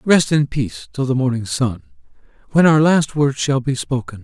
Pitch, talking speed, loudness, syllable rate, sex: 130 Hz, 200 wpm, -17 LUFS, 5.0 syllables/s, male